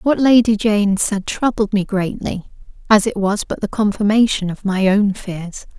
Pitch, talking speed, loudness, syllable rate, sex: 205 Hz, 175 wpm, -17 LUFS, 4.4 syllables/s, female